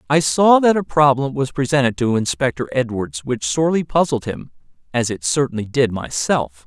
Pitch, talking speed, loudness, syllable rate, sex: 135 Hz, 170 wpm, -18 LUFS, 5.1 syllables/s, male